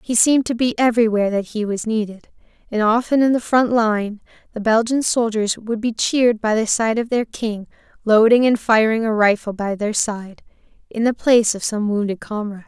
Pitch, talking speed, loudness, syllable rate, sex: 220 Hz, 200 wpm, -18 LUFS, 5.4 syllables/s, female